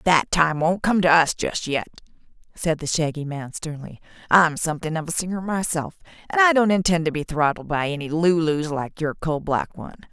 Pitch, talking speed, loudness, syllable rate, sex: 165 Hz, 200 wpm, -22 LUFS, 5.2 syllables/s, female